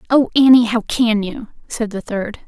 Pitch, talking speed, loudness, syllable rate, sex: 225 Hz, 195 wpm, -16 LUFS, 4.5 syllables/s, female